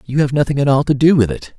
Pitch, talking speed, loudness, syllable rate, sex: 140 Hz, 340 wpm, -15 LUFS, 6.8 syllables/s, male